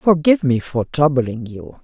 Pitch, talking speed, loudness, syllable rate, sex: 140 Hz, 165 wpm, -17 LUFS, 4.5 syllables/s, female